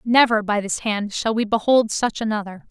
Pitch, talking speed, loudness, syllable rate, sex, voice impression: 215 Hz, 200 wpm, -20 LUFS, 5.0 syllables/s, female, feminine, adult-like, tensed, powerful, bright, clear, fluent, intellectual, lively, intense, sharp